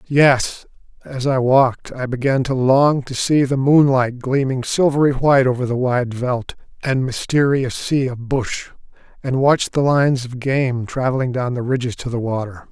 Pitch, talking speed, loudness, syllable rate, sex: 130 Hz, 175 wpm, -18 LUFS, 4.6 syllables/s, male